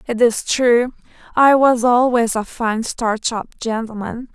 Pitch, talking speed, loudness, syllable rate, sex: 235 Hz, 150 wpm, -17 LUFS, 4.1 syllables/s, female